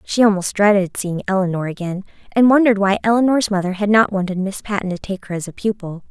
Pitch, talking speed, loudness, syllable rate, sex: 200 Hz, 215 wpm, -18 LUFS, 6.3 syllables/s, female